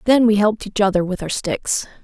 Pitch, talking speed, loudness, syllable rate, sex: 205 Hz, 235 wpm, -18 LUFS, 5.7 syllables/s, female